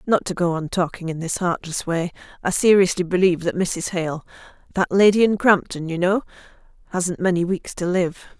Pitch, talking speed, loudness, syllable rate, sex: 180 Hz, 170 wpm, -21 LUFS, 5.3 syllables/s, female